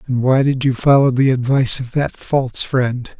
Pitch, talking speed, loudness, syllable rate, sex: 130 Hz, 205 wpm, -16 LUFS, 4.9 syllables/s, male